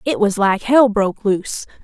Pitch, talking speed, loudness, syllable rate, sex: 215 Hz, 195 wpm, -16 LUFS, 5.1 syllables/s, female